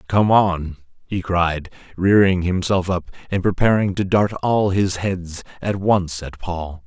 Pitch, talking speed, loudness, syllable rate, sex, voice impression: 90 Hz, 155 wpm, -20 LUFS, 3.8 syllables/s, male, masculine, adult-like, thick, tensed, powerful, slightly soft, slightly muffled, cool, intellectual, calm, friendly, reassuring, wild, slightly lively, kind